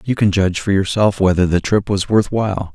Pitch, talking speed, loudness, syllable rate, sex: 100 Hz, 240 wpm, -16 LUFS, 5.7 syllables/s, male